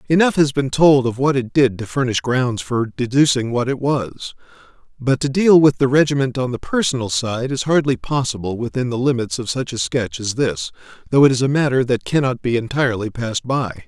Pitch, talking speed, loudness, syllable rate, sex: 130 Hz, 210 wpm, -18 LUFS, 5.4 syllables/s, male